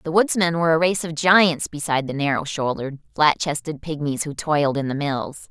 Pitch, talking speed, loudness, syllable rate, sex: 155 Hz, 205 wpm, -21 LUFS, 5.5 syllables/s, female